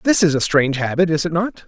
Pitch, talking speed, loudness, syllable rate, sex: 165 Hz, 285 wpm, -17 LUFS, 6.5 syllables/s, male